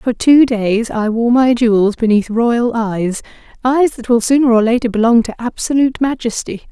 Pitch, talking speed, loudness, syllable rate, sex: 235 Hz, 170 wpm, -14 LUFS, 4.9 syllables/s, female